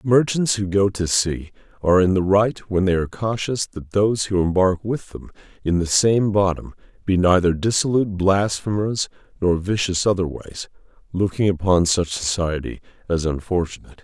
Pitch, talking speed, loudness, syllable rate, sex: 95 Hz, 160 wpm, -20 LUFS, 5.1 syllables/s, male